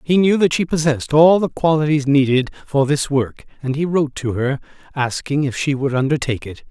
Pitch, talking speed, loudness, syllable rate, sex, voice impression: 145 Hz, 205 wpm, -18 LUFS, 5.6 syllables/s, male, masculine, middle-aged, tensed, powerful, hard, clear, halting, mature, friendly, slightly reassuring, wild, lively, strict, slightly intense